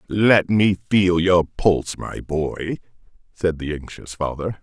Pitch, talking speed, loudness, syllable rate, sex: 90 Hz, 145 wpm, -20 LUFS, 3.9 syllables/s, male